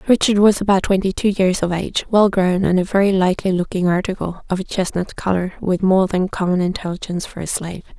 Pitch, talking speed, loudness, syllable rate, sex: 190 Hz, 210 wpm, -18 LUFS, 6.1 syllables/s, female